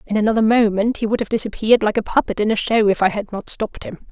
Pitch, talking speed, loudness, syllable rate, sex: 215 Hz, 275 wpm, -18 LUFS, 6.8 syllables/s, female